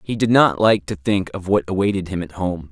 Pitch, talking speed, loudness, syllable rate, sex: 95 Hz, 265 wpm, -19 LUFS, 5.4 syllables/s, male